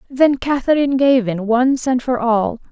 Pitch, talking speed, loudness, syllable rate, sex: 250 Hz, 175 wpm, -16 LUFS, 4.5 syllables/s, female